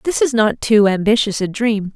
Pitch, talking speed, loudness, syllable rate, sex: 220 Hz, 215 wpm, -16 LUFS, 4.9 syllables/s, female